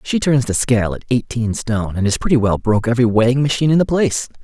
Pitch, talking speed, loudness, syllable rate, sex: 120 Hz, 245 wpm, -17 LUFS, 7.0 syllables/s, male